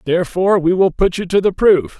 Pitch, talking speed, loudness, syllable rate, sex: 180 Hz, 240 wpm, -15 LUFS, 6.0 syllables/s, male